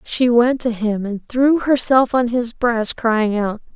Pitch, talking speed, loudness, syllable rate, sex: 235 Hz, 190 wpm, -17 LUFS, 3.7 syllables/s, female